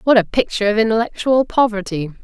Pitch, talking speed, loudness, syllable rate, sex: 220 Hz, 160 wpm, -17 LUFS, 6.4 syllables/s, female